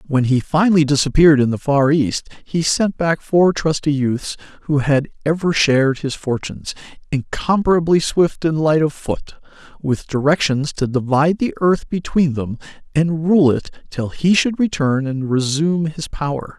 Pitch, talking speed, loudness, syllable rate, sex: 150 Hz, 165 wpm, -17 LUFS, 4.7 syllables/s, male